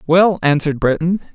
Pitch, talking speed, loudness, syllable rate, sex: 165 Hz, 135 wpm, -16 LUFS, 5.7 syllables/s, male